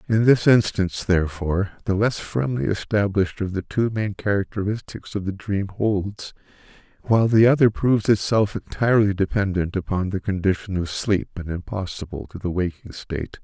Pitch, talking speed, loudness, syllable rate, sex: 100 Hz, 155 wpm, -22 LUFS, 5.3 syllables/s, male